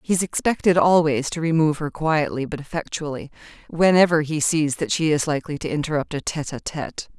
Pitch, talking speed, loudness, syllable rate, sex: 155 Hz, 185 wpm, -21 LUFS, 5.9 syllables/s, female